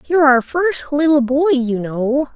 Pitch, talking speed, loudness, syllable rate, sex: 280 Hz, 180 wpm, -16 LUFS, 4.1 syllables/s, female